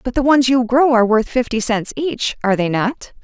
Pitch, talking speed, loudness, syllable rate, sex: 240 Hz, 240 wpm, -16 LUFS, 5.4 syllables/s, female